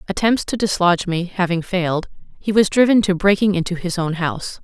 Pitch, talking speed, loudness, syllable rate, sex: 185 Hz, 195 wpm, -18 LUFS, 5.9 syllables/s, female